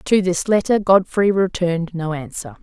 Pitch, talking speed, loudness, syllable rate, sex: 180 Hz, 160 wpm, -18 LUFS, 4.9 syllables/s, female